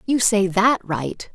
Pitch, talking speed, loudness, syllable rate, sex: 205 Hz, 180 wpm, -19 LUFS, 3.4 syllables/s, female